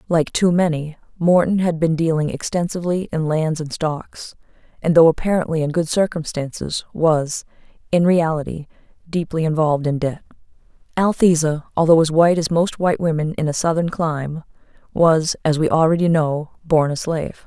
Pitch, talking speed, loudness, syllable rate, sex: 160 Hz, 155 wpm, -19 LUFS, 5.2 syllables/s, female